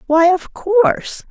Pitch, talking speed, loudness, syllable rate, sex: 340 Hz, 140 wpm, -15 LUFS, 3.6 syllables/s, female